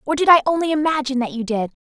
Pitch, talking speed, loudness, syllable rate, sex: 275 Hz, 265 wpm, -18 LUFS, 7.6 syllables/s, female